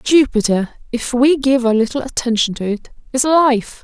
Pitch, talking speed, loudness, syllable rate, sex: 250 Hz, 170 wpm, -16 LUFS, 4.6 syllables/s, female